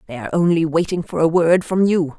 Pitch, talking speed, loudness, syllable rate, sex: 165 Hz, 245 wpm, -18 LUFS, 6.1 syllables/s, female